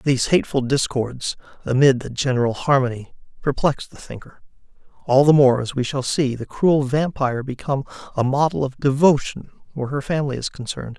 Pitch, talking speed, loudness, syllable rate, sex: 135 Hz, 165 wpm, -20 LUFS, 5.8 syllables/s, male